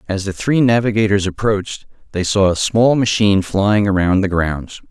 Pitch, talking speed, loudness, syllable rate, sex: 100 Hz, 170 wpm, -16 LUFS, 4.9 syllables/s, male